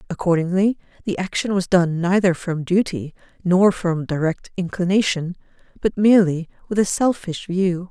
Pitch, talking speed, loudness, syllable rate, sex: 185 Hz, 135 wpm, -20 LUFS, 4.8 syllables/s, female